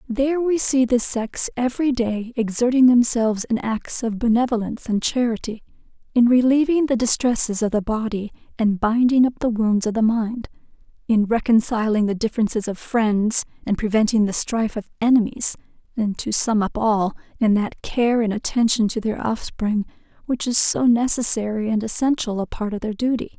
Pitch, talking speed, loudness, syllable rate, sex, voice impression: 230 Hz, 170 wpm, -20 LUFS, 5.2 syllables/s, female, feminine, slightly adult-like, slightly soft, slightly cute, slightly calm, slightly sweet